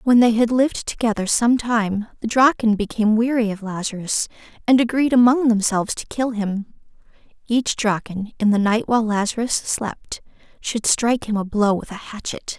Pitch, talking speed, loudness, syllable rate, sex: 225 Hz, 170 wpm, -20 LUFS, 5.1 syllables/s, female